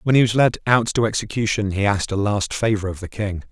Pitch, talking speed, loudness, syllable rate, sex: 105 Hz, 255 wpm, -20 LUFS, 6.1 syllables/s, male